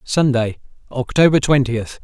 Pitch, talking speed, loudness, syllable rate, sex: 130 Hz, 90 wpm, -17 LUFS, 4.3 syllables/s, male